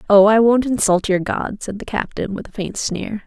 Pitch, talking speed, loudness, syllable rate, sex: 210 Hz, 240 wpm, -18 LUFS, 4.9 syllables/s, female